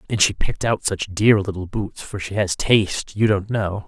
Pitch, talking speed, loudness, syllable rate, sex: 100 Hz, 235 wpm, -21 LUFS, 4.9 syllables/s, male